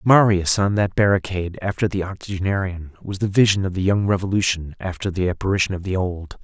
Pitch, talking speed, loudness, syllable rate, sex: 95 Hz, 185 wpm, -21 LUFS, 6.0 syllables/s, male